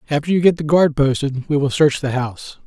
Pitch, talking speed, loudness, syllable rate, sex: 145 Hz, 245 wpm, -17 LUFS, 5.9 syllables/s, male